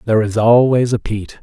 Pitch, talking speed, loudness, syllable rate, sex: 115 Hz, 210 wpm, -14 LUFS, 6.3 syllables/s, male